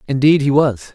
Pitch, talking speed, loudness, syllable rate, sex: 140 Hz, 190 wpm, -15 LUFS, 5.1 syllables/s, male